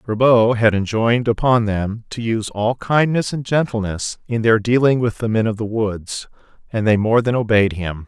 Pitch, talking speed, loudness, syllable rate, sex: 115 Hz, 195 wpm, -18 LUFS, 4.9 syllables/s, male